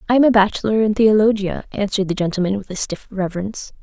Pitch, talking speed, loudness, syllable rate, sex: 205 Hz, 205 wpm, -18 LUFS, 6.8 syllables/s, female